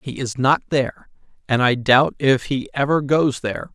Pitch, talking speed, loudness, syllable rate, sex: 130 Hz, 190 wpm, -19 LUFS, 4.9 syllables/s, male